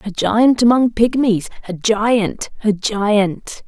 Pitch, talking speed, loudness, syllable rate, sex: 215 Hz, 130 wpm, -16 LUFS, 3.1 syllables/s, female